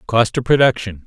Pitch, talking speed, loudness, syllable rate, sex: 115 Hz, 170 wpm, -15 LUFS, 5.4 syllables/s, male